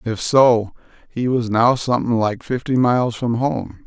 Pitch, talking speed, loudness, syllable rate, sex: 120 Hz, 170 wpm, -18 LUFS, 4.4 syllables/s, male